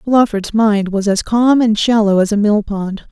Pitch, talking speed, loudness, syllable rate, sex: 215 Hz, 195 wpm, -14 LUFS, 4.4 syllables/s, female